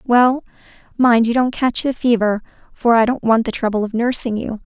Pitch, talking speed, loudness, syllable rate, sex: 235 Hz, 205 wpm, -17 LUFS, 5.1 syllables/s, female